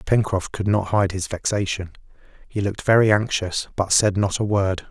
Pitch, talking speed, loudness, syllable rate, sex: 100 Hz, 185 wpm, -21 LUFS, 5.1 syllables/s, male